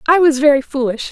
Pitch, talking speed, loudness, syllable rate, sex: 285 Hz, 215 wpm, -14 LUFS, 6.3 syllables/s, female